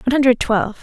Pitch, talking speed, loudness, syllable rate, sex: 235 Hz, 220 wpm, -16 LUFS, 8.5 syllables/s, female